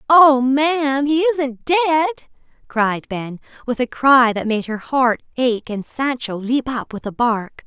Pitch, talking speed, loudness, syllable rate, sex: 260 Hz, 170 wpm, -18 LUFS, 4.0 syllables/s, female